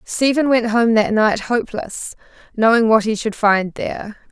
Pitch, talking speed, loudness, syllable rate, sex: 225 Hz, 165 wpm, -17 LUFS, 4.5 syllables/s, female